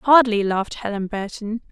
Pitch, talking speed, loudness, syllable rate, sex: 215 Hz, 140 wpm, -21 LUFS, 4.9 syllables/s, female